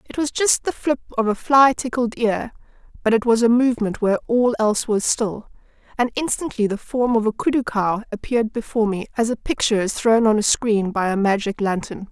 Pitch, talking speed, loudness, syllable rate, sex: 225 Hz, 215 wpm, -20 LUFS, 5.6 syllables/s, female